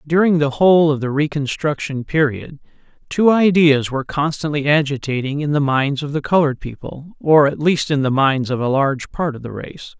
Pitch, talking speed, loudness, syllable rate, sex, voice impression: 145 Hz, 190 wpm, -17 LUFS, 5.3 syllables/s, male, very masculine, very middle-aged, very thick, very tensed, bright, soft, very clear, fluent, cool, intellectual, very refreshing, sincere, very calm, friendly, reassuring, unique, elegant, slightly wild, sweet, lively, kind